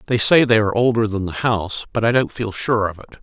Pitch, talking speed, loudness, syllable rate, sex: 110 Hz, 280 wpm, -18 LUFS, 6.4 syllables/s, male